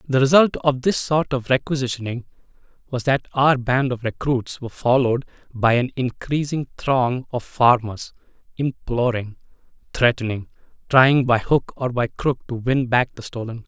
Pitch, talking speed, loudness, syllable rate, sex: 125 Hz, 150 wpm, -20 LUFS, 4.6 syllables/s, male